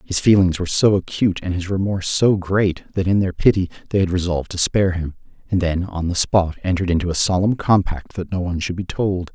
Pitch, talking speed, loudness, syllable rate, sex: 90 Hz, 230 wpm, -19 LUFS, 6.1 syllables/s, male